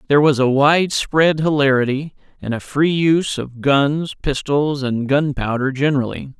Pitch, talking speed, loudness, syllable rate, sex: 140 Hz, 140 wpm, -17 LUFS, 4.8 syllables/s, male